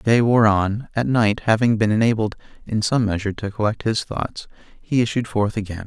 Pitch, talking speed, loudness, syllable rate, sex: 110 Hz, 205 wpm, -20 LUFS, 5.3 syllables/s, male